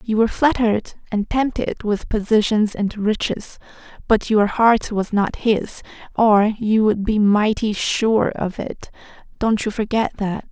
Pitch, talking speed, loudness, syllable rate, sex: 215 Hz, 155 wpm, -19 LUFS, 4.1 syllables/s, female